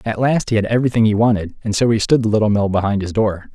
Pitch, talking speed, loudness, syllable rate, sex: 110 Hz, 285 wpm, -17 LUFS, 6.9 syllables/s, male